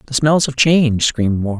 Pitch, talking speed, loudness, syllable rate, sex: 130 Hz, 225 wpm, -15 LUFS, 5.5 syllables/s, male